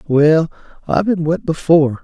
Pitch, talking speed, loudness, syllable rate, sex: 160 Hz, 145 wpm, -15 LUFS, 5.3 syllables/s, male